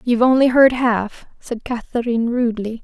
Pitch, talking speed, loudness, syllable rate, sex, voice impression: 235 Hz, 150 wpm, -17 LUFS, 5.4 syllables/s, female, very feminine, very young, very thin, slightly tensed, slightly powerful, very bright, soft, very clear, very fluent, slightly raspy, very cute, intellectual, very refreshing, sincere, slightly calm, very friendly, very reassuring, very unique, elegant, slightly wild, very sweet, very lively, kind, slightly intense, slightly sharp, light